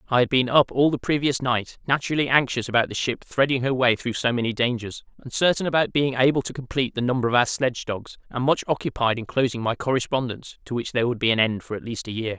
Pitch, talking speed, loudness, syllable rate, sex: 125 Hz, 245 wpm, -23 LUFS, 6.5 syllables/s, male